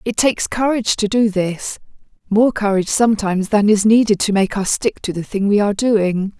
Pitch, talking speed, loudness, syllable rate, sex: 210 Hz, 195 wpm, -16 LUFS, 5.5 syllables/s, female